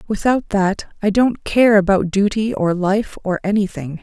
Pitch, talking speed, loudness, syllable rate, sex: 200 Hz, 165 wpm, -17 LUFS, 4.4 syllables/s, female